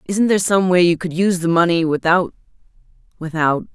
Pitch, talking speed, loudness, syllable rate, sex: 175 Hz, 160 wpm, -17 LUFS, 5.8 syllables/s, female